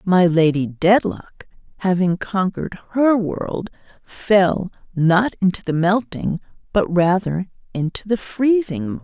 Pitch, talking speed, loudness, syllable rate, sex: 185 Hz, 120 wpm, -19 LUFS, 3.9 syllables/s, female